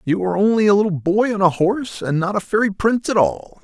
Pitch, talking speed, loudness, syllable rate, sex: 195 Hz, 265 wpm, -18 LUFS, 6.3 syllables/s, male